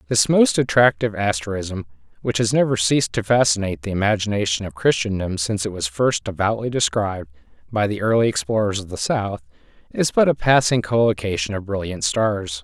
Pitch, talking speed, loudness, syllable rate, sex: 105 Hz, 165 wpm, -20 LUFS, 5.7 syllables/s, male